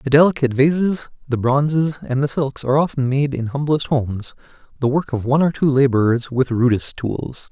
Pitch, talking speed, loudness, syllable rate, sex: 135 Hz, 190 wpm, -19 LUFS, 5.5 syllables/s, male